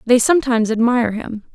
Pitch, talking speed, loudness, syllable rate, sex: 235 Hz, 155 wpm, -16 LUFS, 6.7 syllables/s, female